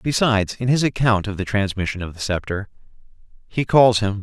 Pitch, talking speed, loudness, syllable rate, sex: 110 Hz, 185 wpm, -20 LUFS, 5.7 syllables/s, male